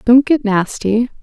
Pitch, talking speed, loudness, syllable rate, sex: 235 Hz, 145 wpm, -15 LUFS, 3.9 syllables/s, female